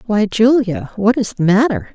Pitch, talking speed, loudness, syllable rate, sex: 215 Hz, 185 wpm, -15 LUFS, 4.6 syllables/s, female